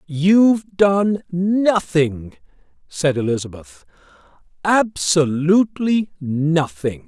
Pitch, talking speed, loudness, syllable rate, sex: 165 Hz, 60 wpm, -18 LUFS, 3.1 syllables/s, male